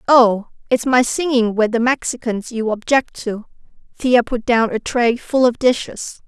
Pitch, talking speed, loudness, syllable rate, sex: 235 Hz, 170 wpm, -17 LUFS, 4.3 syllables/s, female